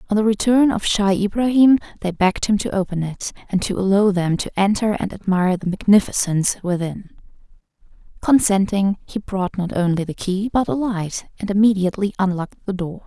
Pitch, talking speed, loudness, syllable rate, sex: 195 Hz, 175 wpm, -19 LUFS, 5.6 syllables/s, female